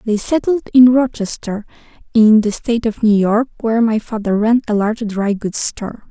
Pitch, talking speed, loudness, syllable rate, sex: 225 Hz, 185 wpm, -15 LUFS, 5.2 syllables/s, female